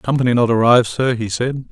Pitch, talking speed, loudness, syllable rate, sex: 120 Hz, 210 wpm, -16 LUFS, 6.1 syllables/s, male